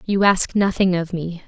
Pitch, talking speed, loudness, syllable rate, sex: 185 Hz, 205 wpm, -19 LUFS, 4.4 syllables/s, female